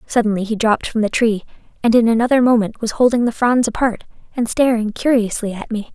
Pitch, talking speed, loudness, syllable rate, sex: 225 Hz, 200 wpm, -17 LUFS, 6.0 syllables/s, female